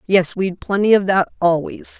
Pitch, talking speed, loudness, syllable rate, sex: 190 Hz, 180 wpm, -17 LUFS, 4.6 syllables/s, female